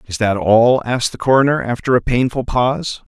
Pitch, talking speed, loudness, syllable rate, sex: 120 Hz, 190 wpm, -16 LUFS, 5.5 syllables/s, male